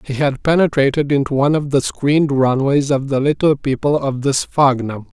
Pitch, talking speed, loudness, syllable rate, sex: 140 Hz, 185 wpm, -16 LUFS, 5.2 syllables/s, male